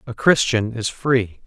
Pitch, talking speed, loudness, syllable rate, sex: 115 Hz, 165 wpm, -19 LUFS, 3.8 syllables/s, male